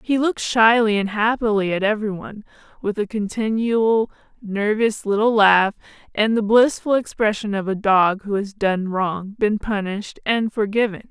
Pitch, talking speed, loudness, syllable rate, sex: 210 Hz, 155 wpm, -20 LUFS, 4.8 syllables/s, female